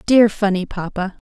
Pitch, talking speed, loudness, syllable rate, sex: 200 Hz, 140 wpm, -18 LUFS, 4.6 syllables/s, female